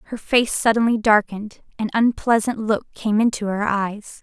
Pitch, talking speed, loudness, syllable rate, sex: 215 Hz, 155 wpm, -20 LUFS, 4.5 syllables/s, female